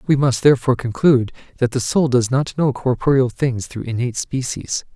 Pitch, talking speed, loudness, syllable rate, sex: 130 Hz, 180 wpm, -18 LUFS, 5.6 syllables/s, male